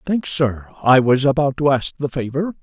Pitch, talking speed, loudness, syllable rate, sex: 135 Hz, 205 wpm, -18 LUFS, 4.7 syllables/s, male